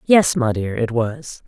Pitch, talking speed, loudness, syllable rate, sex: 160 Hz, 205 wpm, -19 LUFS, 3.7 syllables/s, female